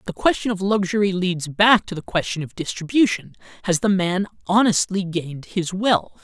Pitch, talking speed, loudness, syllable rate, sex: 190 Hz, 175 wpm, -21 LUFS, 5.0 syllables/s, male